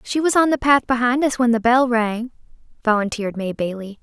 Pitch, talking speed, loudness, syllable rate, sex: 240 Hz, 210 wpm, -19 LUFS, 5.6 syllables/s, female